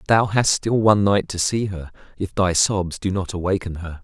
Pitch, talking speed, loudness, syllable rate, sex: 95 Hz, 225 wpm, -20 LUFS, 5.1 syllables/s, male